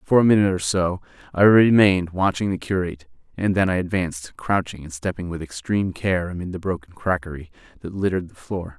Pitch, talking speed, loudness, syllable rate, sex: 90 Hz, 190 wpm, -21 LUFS, 6.1 syllables/s, male